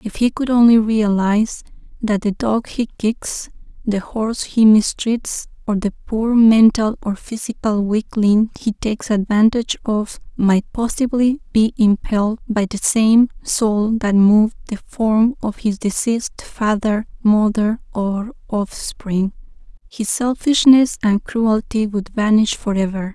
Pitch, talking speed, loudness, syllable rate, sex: 215 Hz, 130 wpm, -17 LUFS, 4.0 syllables/s, female